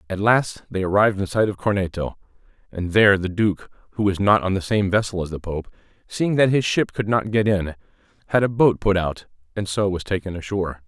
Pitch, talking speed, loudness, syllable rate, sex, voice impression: 100 Hz, 220 wpm, -21 LUFS, 5.7 syllables/s, male, masculine, middle-aged, thick, tensed, slightly powerful, hard, fluent, cool, calm, mature, wild, lively, slightly strict, modest